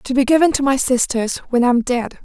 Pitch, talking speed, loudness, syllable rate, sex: 255 Hz, 270 wpm, -17 LUFS, 5.8 syllables/s, female